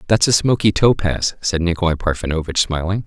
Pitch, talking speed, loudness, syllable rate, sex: 90 Hz, 155 wpm, -17 LUFS, 5.8 syllables/s, male